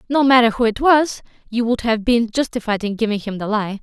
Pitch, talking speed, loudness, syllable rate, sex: 230 Hz, 235 wpm, -18 LUFS, 5.8 syllables/s, female